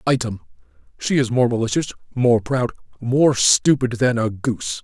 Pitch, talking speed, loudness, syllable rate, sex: 120 Hz, 135 wpm, -19 LUFS, 4.7 syllables/s, male